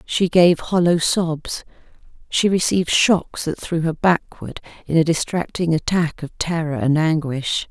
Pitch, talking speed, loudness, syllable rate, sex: 165 Hz, 150 wpm, -19 LUFS, 4.2 syllables/s, female